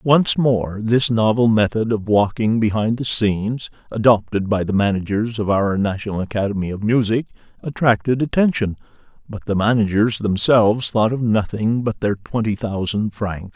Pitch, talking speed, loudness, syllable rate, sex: 110 Hz, 150 wpm, -19 LUFS, 4.9 syllables/s, male